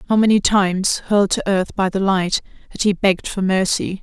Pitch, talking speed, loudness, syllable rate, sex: 195 Hz, 210 wpm, -18 LUFS, 5.2 syllables/s, female